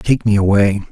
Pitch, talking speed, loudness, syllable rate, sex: 105 Hz, 200 wpm, -14 LUFS, 5.1 syllables/s, male